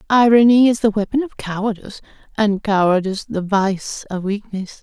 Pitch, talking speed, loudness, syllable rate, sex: 210 Hz, 150 wpm, -17 LUFS, 5.2 syllables/s, female